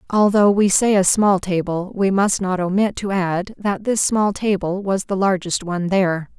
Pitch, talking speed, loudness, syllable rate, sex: 190 Hz, 195 wpm, -18 LUFS, 4.6 syllables/s, female